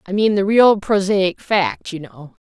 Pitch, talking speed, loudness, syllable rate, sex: 190 Hz, 195 wpm, -16 LUFS, 4.0 syllables/s, female